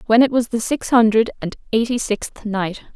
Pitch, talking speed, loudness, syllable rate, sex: 225 Hz, 205 wpm, -19 LUFS, 4.9 syllables/s, female